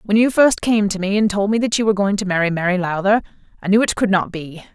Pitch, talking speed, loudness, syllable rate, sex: 200 Hz, 290 wpm, -17 LUFS, 6.5 syllables/s, female